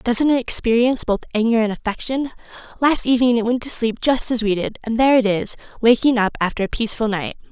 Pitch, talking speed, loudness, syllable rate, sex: 235 Hz, 215 wpm, -19 LUFS, 6.2 syllables/s, female